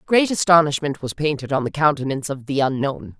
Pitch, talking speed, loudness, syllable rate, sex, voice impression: 145 Hz, 190 wpm, -20 LUFS, 5.9 syllables/s, female, feminine, very adult-like, slightly fluent, intellectual, slightly sharp